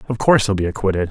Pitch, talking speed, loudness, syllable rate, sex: 105 Hz, 270 wpm, -17 LUFS, 8.6 syllables/s, male